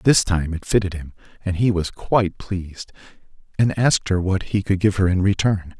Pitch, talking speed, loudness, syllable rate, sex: 95 Hz, 205 wpm, -20 LUFS, 5.2 syllables/s, male